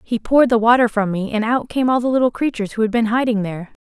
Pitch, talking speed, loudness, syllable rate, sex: 230 Hz, 285 wpm, -17 LUFS, 6.9 syllables/s, female